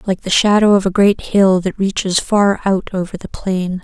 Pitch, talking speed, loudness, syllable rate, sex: 195 Hz, 220 wpm, -15 LUFS, 4.8 syllables/s, female